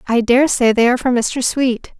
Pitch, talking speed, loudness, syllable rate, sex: 245 Hz, 240 wpm, -15 LUFS, 4.9 syllables/s, female